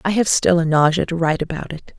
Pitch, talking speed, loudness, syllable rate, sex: 170 Hz, 270 wpm, -18 LUFS, 6.4 syllables/s, female